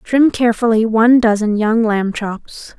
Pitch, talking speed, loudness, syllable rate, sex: 225 Hz, 150 wpm, -14 LUFS, 4.5 syllables/s, female